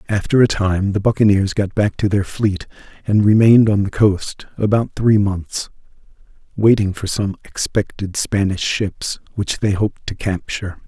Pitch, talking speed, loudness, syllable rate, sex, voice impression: 100 Hz, 160 wpm, -17 LUFS, 4.6 syllables/s, male, very masculine, very adult-like, very middle-aged, very thick, relaxed, slightly weak, dark, soft, muffled, fluent, cool, intellectual, very sincere, very calm, very friendly, very reassuring, slightly unique, very elegant, sweet, slightly lively, very kind, modest